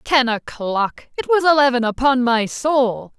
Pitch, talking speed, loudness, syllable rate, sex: 255 Hz, 150 wpm, -18 LUFS, 3.9 syllables/s, female